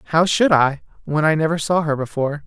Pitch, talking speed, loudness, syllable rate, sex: 155 Hz, 220 wpm, -18 LUFS, 6.1 syllables/s, male